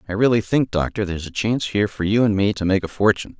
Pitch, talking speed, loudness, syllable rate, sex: 100 Hz, 285 wpm, -20 LUFS, 7.2 syllables/s, male